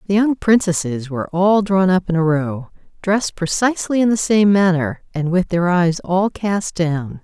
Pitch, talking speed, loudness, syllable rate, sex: 180 Hz, 190 wpm, -17 LUFS, 4.7 syllables/s, female